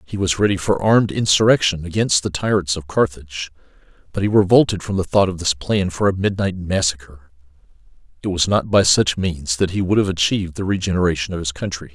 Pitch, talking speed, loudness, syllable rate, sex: 90 Hz, 195 wpm, -18 LUFS, 5.9 syllables/s, male